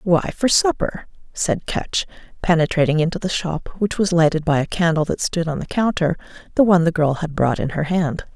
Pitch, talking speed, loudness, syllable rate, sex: 170 Hz, 210 wpm, -20 LUFS, 5.4 syllables/s, female